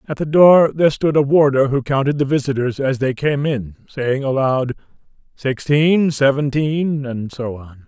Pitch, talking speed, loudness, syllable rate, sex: 140 Hz, 170 wpm, -17 LUFS, 4.5 syllables/s, male